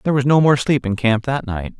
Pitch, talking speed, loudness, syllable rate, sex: 125 Hz, 300 wpm, -17 LUFS, 6.1 syllables/s, male